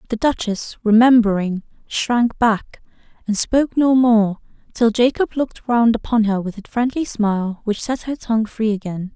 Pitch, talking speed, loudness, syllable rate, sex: 225 Hz, 165 wpm, -18 LUFS, 4.8 syllables/s, female